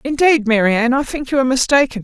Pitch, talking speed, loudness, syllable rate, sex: 255 Hz, 205 wpm, -15 LUFS, 6.7 syllables/s, female